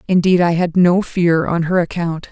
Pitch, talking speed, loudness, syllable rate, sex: 175 Hz, 205 wpm, -15 LUFS, 4.7 syllables/s, female